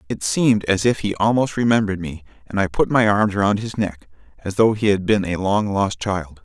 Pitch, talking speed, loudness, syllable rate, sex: 100 Hz, 235 wpm, -19 LUFS, 5.4 syllables/s, male